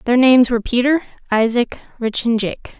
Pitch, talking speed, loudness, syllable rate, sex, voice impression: 240 Hz, 170 wpm, -17 LUFS, 5.7 syllables/s, female, very feminine, young, slightly adult-like, very thin, very tensed, slightly powerful, very bright, slightly hard, very clear, very fluent, slightly raspy, cute, slightly cool, intellectual, very refreshing, sincere, calm, friendly, reassuring, very unique, elegant, slightly wild, very sweet, lively, kind, slightly intense, slightly sharp, light